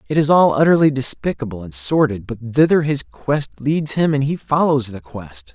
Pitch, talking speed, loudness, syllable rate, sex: 135 Hz, 195 wpm, -17 LUFS, 4.9 syllables/s, male